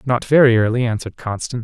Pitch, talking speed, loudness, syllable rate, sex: 120 Hz, 185 wpm, -17 LUFS, 7.2 syllables/s, male